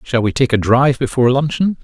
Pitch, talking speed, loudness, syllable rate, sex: 130 Hz, 230 wpm, -15 LUFS, 6.4 syllables/s, male